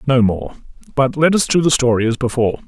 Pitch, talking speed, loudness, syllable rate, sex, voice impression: 125 Hz, 225 wpm, -16 LUFS, 6.2 syllables/s, male, masculine, middle-aged, tensed, powerful, bright, soft, cool, intellectual, calm, slightly mature, friendly, reassuring, wild, kind